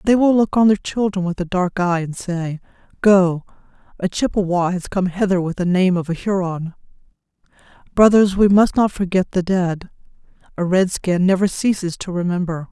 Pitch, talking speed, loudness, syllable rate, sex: 185 Hz, 180 wpm, -18 LUFS, 5.0 syllables/s, female